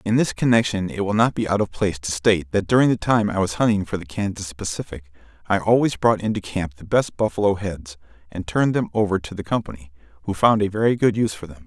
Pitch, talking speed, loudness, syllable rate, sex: 95 Hz, 240 wpm, -21 LUFS, 6.3 syllables/s, male